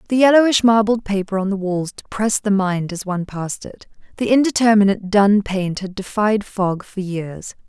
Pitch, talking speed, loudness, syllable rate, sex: 205 Hz, 180 wpm, -18 LUFS, 5.2 syllables/s, female